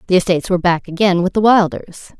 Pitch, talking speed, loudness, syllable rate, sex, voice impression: 185 Hz, 220 wpm, -15 LUFS, 6.6 syllables/s, female, very feminine, adult-like, slightly middle-aged, thin, slightly tensed, slightly weak, bright, hard, clear, slightly fluent, cool, very intellectual, very refreshing, sincere, very calm, friendly, very reassuring, unique, very elegant, slightly wild, sweet, lively, slightly strict, slightly intense